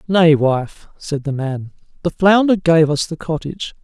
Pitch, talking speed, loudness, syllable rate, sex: 160 Hz, 170 wpm, -17 LUFS, 4.4 syllables/s, male